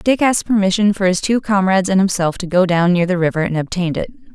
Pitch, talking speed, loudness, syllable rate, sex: 190 Hz, 250 wpm, -16 LUFS, 6.6 syllables/s, female